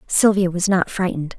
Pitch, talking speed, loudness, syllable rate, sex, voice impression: 185 Hz, 175 wpm, -19 LUFS, 5.7 syllables/s, female, very feminine, slightly young, very thin, tensed, slightly powerful, bright, slightly hard, clear, fluent, slightly raspy, very cute, slightly intellectual, very refreshing, sincere, calm, very unique, elegant, slightly wild, very sweet, very lively, kind, slightly intense, sharp, very light